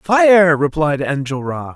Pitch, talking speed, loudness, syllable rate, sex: 150 Hz, 105 wpm, -15 LUFS, 3.4 syllables/s, male